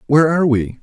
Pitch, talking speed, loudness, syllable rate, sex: 140 Hz, 220 wpm, -15 LUFS, 7.8 syllables/s, male